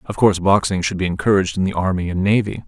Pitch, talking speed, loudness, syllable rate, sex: 95 Hz, 245 wpm, -18 LUFS, 7.1 syllables/s, male